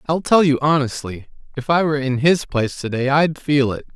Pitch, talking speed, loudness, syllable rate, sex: 140 Hz, 230 wpm, -18 LUFS, 5.5 syllables/s, male